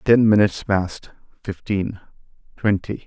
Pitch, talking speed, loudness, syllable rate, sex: 100 Hz, 100 wpm, -20 LUFS, 4.7 syllables/s, male